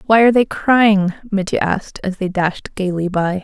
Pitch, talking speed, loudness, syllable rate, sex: 200 Hz, 190 wpm, -17 LUFS, 4.9 syllables/s, female